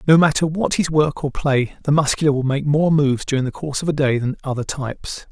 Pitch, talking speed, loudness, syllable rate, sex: 145 Hz, 250 wpm, -19 LUFS, 6.1 syllables/s, male